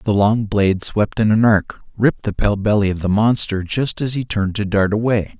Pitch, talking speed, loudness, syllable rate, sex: 105 Hz, 235 wpm, -18 LUFS, 5.3 syllables/s, male